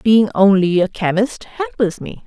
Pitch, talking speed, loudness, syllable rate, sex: 215 Hz, 160 wpm, -16 LUFS, 4.1 syllables/s, female